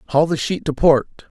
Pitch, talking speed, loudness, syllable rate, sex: 150 Hz, 215 wpm, -18 LUFS, 4.8 syllables/s, male